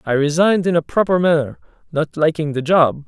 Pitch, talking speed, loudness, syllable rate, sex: 155 Hz, 195 wpm, -17 LUFS, 5.7 syllables/s, male